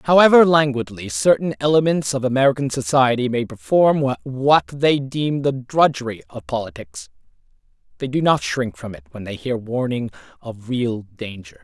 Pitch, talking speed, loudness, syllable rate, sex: 135 Hz, 150 wpm, -19 LUFS, 4.8 syllables/s, male